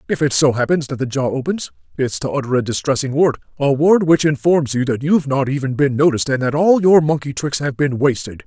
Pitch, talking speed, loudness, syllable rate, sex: 140 Hz, 240 wpm, -17 LUFS, 6.0 syllables/s, male